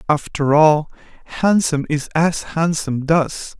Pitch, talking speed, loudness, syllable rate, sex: 155 Hz, 115 wpm, -17 LUFS, 4.4 syllables/s, male